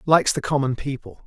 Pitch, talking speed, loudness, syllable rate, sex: 140 Hz, 190 wpm, -22 LUFS, 6.3 syllables/s, male